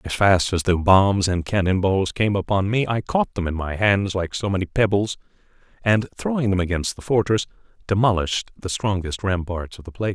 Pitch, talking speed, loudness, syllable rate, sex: 95 Hz, 200 wpm, -21 LUFS, 5.3 syllables/s, male